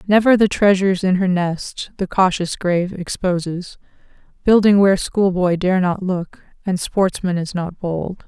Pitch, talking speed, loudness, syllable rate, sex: 185 Hz, 150 wpm, -18 LUFS, 4.4 syllables/s, female